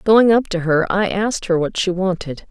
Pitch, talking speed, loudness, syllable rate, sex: 190 Hz, 240 wpm, -18 LUFS, 5.1 syllables/s, female